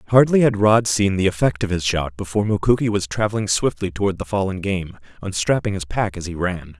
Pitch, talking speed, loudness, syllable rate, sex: 100 Hz, 210 wpm, -20 LUFS, 5.9 syllables/s, male